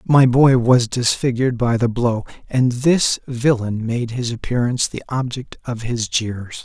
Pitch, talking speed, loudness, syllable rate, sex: 120 Hz, 165 wpm, -18 LUFS, 4.3 syllables/s, male